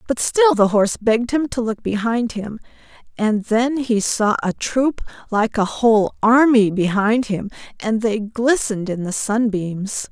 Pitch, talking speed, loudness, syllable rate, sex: 225 Hz, 165 wpm, -18 LUFS, 4.3 syllables/s, female